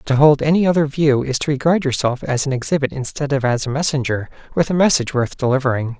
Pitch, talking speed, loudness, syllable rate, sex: 140 Hz, 220 wpm, -18 LUFS, 6.4 syllables/s, male